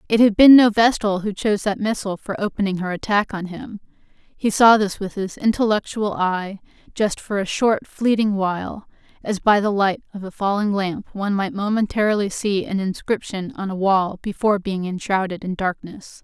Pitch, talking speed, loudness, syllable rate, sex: 200 Hz, 185 wpm, -20 LUFS, 5.1 syllables/s, female